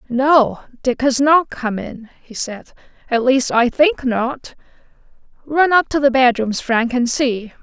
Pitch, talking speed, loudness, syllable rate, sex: 255 Hz, 165 wpm, -16 LUFS, 3.7 syllables/s, female